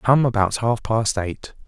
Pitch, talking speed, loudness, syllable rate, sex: 110 Hz, 180 wpm, -21 LUFS, 4.1 syllables/s, male